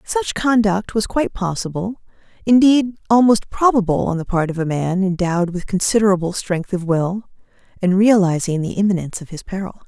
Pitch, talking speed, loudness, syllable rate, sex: 195 Hz, 165 wpm, -18 LUFS, 5.5 syllables/s, female